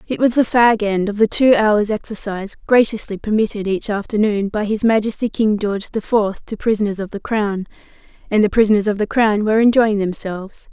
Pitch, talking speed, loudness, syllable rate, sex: 210 Hz, 195 wpm, -17 LUFS, 5.6 syllables/s, female